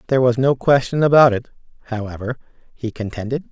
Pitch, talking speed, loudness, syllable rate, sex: 125 Hz, 155 wpm, -18 LUFS, 6.2 syllables/s, male